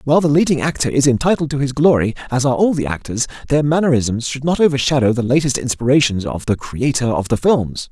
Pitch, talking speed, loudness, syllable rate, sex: 135 Hz, 210 wpm, -16 LUFS, 6.2 syllables/s, male